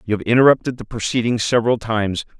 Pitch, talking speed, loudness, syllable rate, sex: 115 Hz, 175 wpm, -18 LUFS, 7.1 syllables/s, male